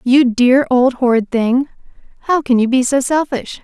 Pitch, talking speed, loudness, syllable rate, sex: 255 Hz, 180 wpm, -14 LUFS, 4.5 syllables/s, female